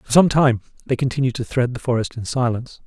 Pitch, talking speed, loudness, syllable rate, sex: 125 Hz, 230 wpm, -20 LUFS, 6.2 syllables/s, male